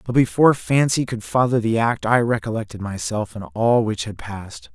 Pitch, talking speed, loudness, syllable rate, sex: 115 Hz, 190 wpm, -20 LUFS, 5.3 syllables/s, male